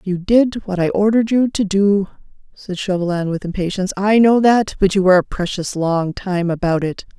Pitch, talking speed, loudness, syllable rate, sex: 195 Hz, 200 wpm, -17 LUFS, 5.3 syllables/s, female